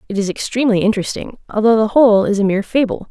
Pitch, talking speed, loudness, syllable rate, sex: 215 Hz, 210 wpm, -15 LUFS, 7.5 syllables/s, female